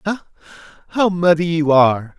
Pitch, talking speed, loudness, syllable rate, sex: 165 Hz, 135 wpm, -16 LUFS, 5.0 syllables/s, male